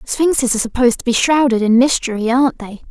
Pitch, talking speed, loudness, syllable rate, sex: 245 Hz, 205 wpm, -15 LUFS, 6.5 syllables/s, female